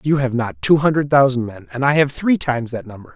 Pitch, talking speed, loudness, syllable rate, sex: 135 Hz, 265 wpm, -17 LUFS, 6.1 syllables/s, male